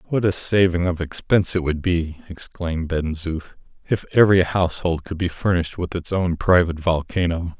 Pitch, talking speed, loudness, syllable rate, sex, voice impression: 85 Hz, 175 wpm, -21 LUFS, 5.4 syllables/s, male, masculine, middle-aged, thick, tensed, slightly dark, clear, cool, sincere, calm, mature, friendly, reassuring, wild, kind, modest